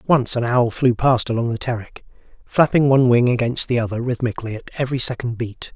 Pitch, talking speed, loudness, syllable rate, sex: 120 Hz, 200 wpm, -19 LUFS, 6.2 syllables/s, male